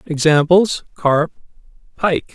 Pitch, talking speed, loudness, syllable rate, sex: 160 Hz, 75 wpm, -16 LUFS, 3.4 syllables/s, male